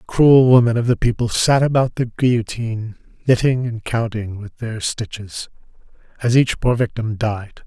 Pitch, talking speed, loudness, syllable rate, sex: 115 Hz, 155 wpm, -18 LUFS, 4.7 syllables/s, male